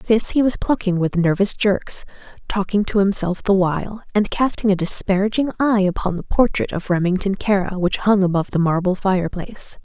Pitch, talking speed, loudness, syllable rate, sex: 195 Hz, 175 wpm, -19 LUFS, 5.3 syllables/s, female